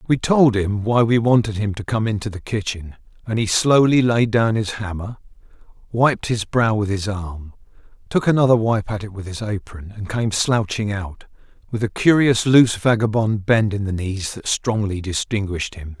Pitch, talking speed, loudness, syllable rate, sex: 110 Hz, 190 wpm, -19 LUFS, 4.9 syllables/s, male